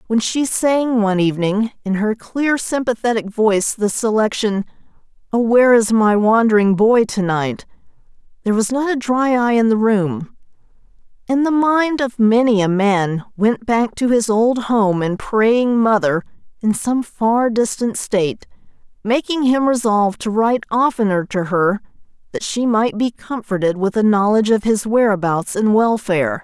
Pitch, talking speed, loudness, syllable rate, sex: 220 Hz, 160 wpm, -17 LUFS, 4.6 syllables/s, female